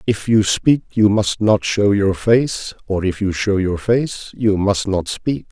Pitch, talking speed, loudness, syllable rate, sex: 105 Hz, 205 wpm, -17 LUFS, 3.7 syllables/s, male